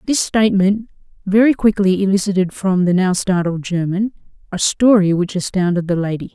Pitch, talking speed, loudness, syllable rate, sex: 190 Hz, 150 wpm, -16 LUFS, 5.3 syllables/s, female